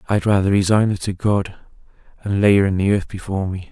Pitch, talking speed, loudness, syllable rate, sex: 100 Hz, 225 wpm, -18 LUFS, 6.1 syllables/s, male